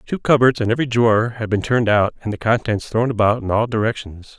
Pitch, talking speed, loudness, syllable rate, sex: 115 Hz, 235 wpm, -18 LUFS, 6.3 syllables/s, male